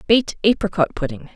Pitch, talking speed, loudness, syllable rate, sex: 195 Hz, 135 wpm, -20 LUFS, 6.4 syllables/s, female